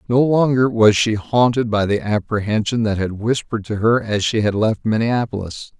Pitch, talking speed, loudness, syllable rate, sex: 110 Hz, 185 wpm, -18 LUFS, 5.0 syllables/s, male